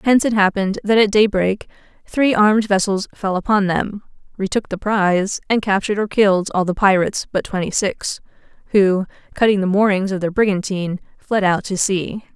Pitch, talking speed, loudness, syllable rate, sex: 200 Hz, 175 wpm, -18 LUFS, 5.4 syllables/s, female